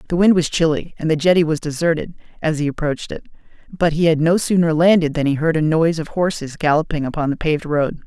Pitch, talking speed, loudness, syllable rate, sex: 160 Hz, 230 wpm, -18 LUFS, 6.4 syllables/s, male